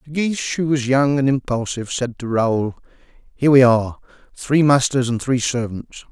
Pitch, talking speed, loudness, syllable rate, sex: 130 Hz, 175 wpm, -18 LUFS, 5.1 syllables/s, male